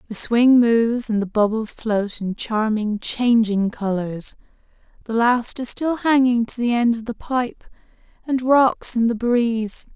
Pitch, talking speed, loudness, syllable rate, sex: 230 Hz, 165 wpm, -20 LUFS, 4.0 syllables/s, female